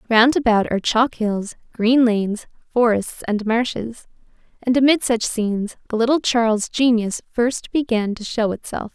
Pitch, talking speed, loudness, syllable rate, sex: 230 Hz, 155 wpm, -19 LUFS, 4.6 syllables/s, female